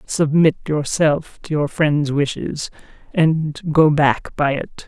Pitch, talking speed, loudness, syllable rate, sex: 150 Hz, 135 wpm, -18 LUFS, 3.5 syllables/s, female